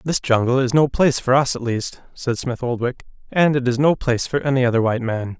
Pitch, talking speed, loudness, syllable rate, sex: 130 Hz, 245 wpm, -19 LUFS, 5.8 syllables/s, male